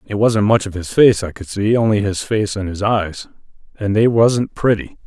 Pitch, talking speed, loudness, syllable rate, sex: 105 Hz, 215 wpm, -17 LUFS, 4.8 syllables/s, male